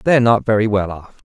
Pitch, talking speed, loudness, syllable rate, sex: 110 Hz, 235 wpm, -16 LUFS, 6.5 syllables/s, male